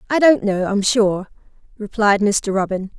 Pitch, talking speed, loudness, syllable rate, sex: 210 Hz, 160 wpm, -17 LUFS, 4.4 syllables/s, female